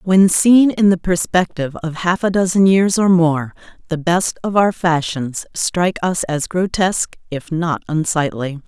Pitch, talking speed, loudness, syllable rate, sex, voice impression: 175 Hz, 165 wpm, -16 LUFS, 4.3 syllables/s, female, very feminine, very adult-like, slightly calm, elegant, slightly sweet